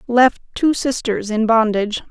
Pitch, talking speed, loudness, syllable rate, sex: 230 Hz, 140 wpm, -17 LUFS, 4.5 syllables/s, female